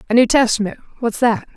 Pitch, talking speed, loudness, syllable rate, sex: 235 Hz, 190 wpm, -17 LUFS, 6.4 syllables/s, female